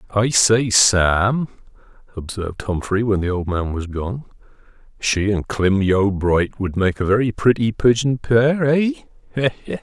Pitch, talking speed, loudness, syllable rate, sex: 105 Hz, 135 wpm, -18 LUFS, 4.1 syllables/s, male